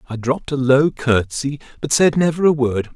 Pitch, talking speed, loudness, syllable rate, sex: 135 Hz, 205 wpm, -17 LUFS, 5.1 syllables/s, male